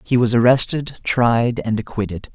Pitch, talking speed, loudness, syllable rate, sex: 120 Hz, 155 wpm, -18 LUFS, 4.5 syllables/s, male